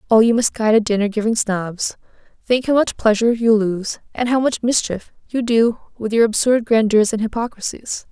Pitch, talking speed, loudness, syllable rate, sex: 225 Hz, 175 wpm, -18 LUFS, 5.2 syllables/s, female